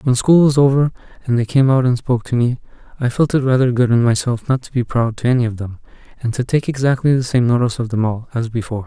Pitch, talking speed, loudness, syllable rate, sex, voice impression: 125 Hz, 265 wpm, -17 LUFS, 6.6 syllables/s, male, masculine, adult-like, slightly soft, sincere, slightly calm, slightly sweet, kind